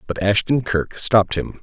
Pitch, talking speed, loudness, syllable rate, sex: 100 Hz, 185 wpm, -19 LUFS, 4.8 syllables/s, male